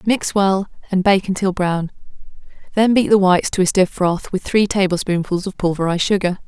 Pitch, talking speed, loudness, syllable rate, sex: 190 Hz, 185 wpm, -17 LUFS, 5.5 syllables/s, female